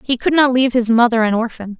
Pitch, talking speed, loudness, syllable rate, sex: 240 Hz, 270 wpm, -15 LUFS, 6.5 syllables/s, female